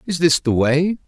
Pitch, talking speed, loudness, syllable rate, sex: 150 Hz, 225 wpm, -17 LUFS, 4.6 syllables/s, male